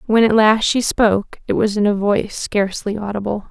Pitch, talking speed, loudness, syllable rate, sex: 210 Hz, 205 wpm, -17 LUFS, 5.5 syllables/s, female